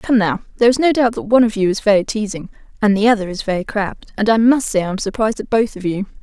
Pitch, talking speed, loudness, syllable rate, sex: 215 Hz, 280 wpm, -17 LUFS, 6.9 syllables/s, female